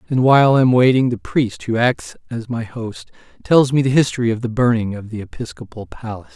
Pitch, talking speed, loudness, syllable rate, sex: 120 Hz, 215 wpm, -17 LUFS, 5.8 syllables/s, male